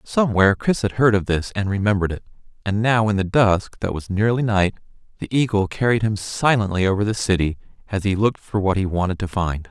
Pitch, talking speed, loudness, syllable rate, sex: 105 Hz, 215 wpm, -20 LUFS, 5.9 syllables/s, male